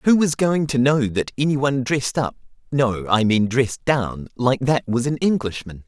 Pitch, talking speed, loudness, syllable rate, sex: 130 Hz, 185 wpm, -20 LUFS, 5.0 syllables/s, male